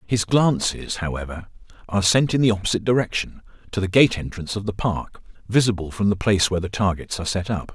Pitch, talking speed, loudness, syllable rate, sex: 100 Hz, 195 wpm, -22 LUFS, 6.4 syllables/s, male